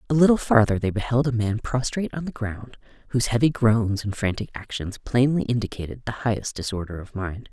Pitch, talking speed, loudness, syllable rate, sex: 115 Hz, 190 wpm, -24 LUFS, 5.9 syllables/s, female